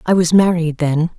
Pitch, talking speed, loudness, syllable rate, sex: 170 Hz, 205 wpm, -15 LUFS, 4.9 syllables/s, female